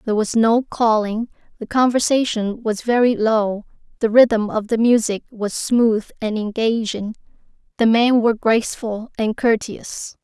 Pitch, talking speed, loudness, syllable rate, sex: 225 Hz, 140 wpm, -18 LUFS, 4.3 syllables/s, female